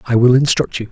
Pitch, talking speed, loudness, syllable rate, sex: 125 Hz, 265 wpm, -14 LUFS, 6.2 syllables/s, male